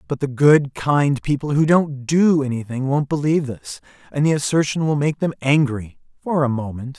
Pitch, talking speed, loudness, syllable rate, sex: 140 Hz, 180 wpm, -19 LUFS, 5.0 syllables/s, male